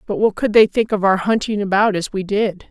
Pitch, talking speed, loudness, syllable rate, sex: 205 Hz, 265 wpm, -17 LUFS, 5.5 syllables/s, female